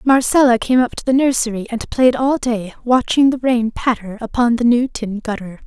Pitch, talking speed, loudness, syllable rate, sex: 240 Hz, 200 wpm, -16 LUFS, 5.0 syllables/s, female